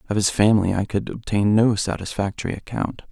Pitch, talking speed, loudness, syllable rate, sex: 105 Hz, 175 wpm, -21 LUFS, 5.8 syllables/s, male